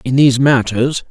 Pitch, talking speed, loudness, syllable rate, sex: 130 Hz, 165 wpm, -13 LUFS, 5.1 syllables/s, male